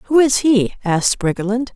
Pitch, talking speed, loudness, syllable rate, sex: 230 Hz, 170 wpm, -16 LUFS, 4.9 syllables/s, female